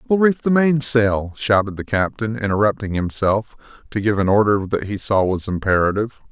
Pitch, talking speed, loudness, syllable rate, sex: 110 Hz, 170 wpm, -19 LUFS, 5.4 syllables/s, male